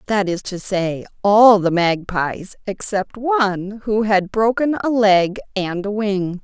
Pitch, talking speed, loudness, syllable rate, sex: 205 Hz, 160 wpm, -18 LUFS, 3.7 syllables/s, female